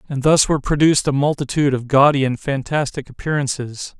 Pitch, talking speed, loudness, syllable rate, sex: 140 Hz, 165 wpm, -18 LUFS, 6.0 syllables/s, male